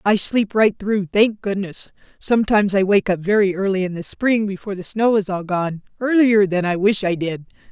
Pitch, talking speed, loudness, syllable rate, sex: 200 Hz, 210 wpm, -19 LUFS, 5.2 syllables/s, female